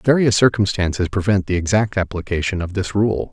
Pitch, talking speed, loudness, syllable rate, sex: 100 Hz, 165 wpm, -19 LUFS, 5.5 syllables/s, male